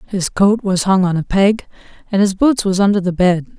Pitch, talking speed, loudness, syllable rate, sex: 195 Hz, 235 wpm, -15 LUFS, 5.1 syllables/s, female